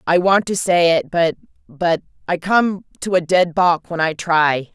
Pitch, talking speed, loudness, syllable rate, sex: 175 Hz, 190 wpm, -17 LUFS, 4.2 syllables/s, female